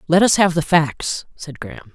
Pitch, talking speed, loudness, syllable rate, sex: 160 Hz, 215 wpm, -17 LUFS, 4.7 syllables/s, male